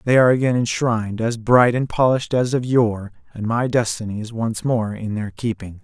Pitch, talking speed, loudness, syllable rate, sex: 115 Hz, 205 wpm, -20 LUFS, 5.3 syllables/s, male